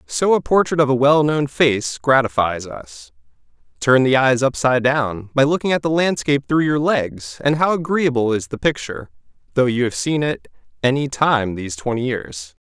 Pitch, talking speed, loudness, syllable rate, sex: 130 Hz, 180 wpm, -18 LUFS, 5.0 syllables/s, male